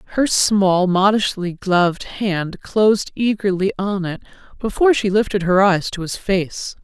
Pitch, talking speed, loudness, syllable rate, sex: 195 Hz, 150 wpm, -18 LUFS, 4.4 syllables/s, female